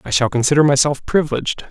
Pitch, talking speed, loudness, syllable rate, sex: 140 Hz, 175 wpm, -16 LUFS, 6.8 syllables/s, male